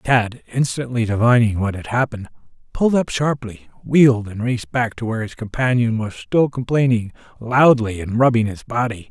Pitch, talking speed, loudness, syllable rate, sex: 120 Hz, 165 wpm, -19 LUFS, 5.3 syllables/s, male